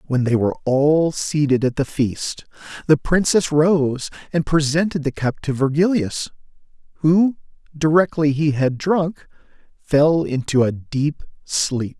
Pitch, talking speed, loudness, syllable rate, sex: 150 Hz, 135 wpm, -19 LUFS, 4.0 syllables/s, male